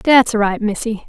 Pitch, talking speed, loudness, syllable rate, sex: 220 Hz, 165 wpm, -16 LUFS, 3.9 syllables/s, female